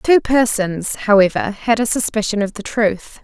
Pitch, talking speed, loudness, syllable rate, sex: 215 Hz, 165 wpm, -17 LUFS, 4.4 syllables/s, female